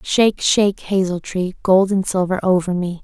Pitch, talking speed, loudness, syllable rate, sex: 190 Hz, 180 wpm, -18 LUFS, 5.0 syllables/s, female